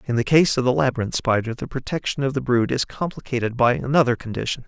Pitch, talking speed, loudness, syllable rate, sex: 130 Hz, 220 wpm, -21 LUFS, 6.4 syllables/s, male